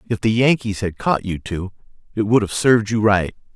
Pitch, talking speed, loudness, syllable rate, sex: 105 Hz, 220 wpm, -19 LUFS, 5.3 syllables/s, male